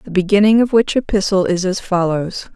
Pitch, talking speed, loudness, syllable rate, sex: 195 Hz, 190 wpm, -16 LUFS, 5.4 syllables/s, female